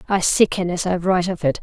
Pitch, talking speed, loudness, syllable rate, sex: 180 Hz, 260 wpm, -19 LUFS, 6.2 syllables/s, female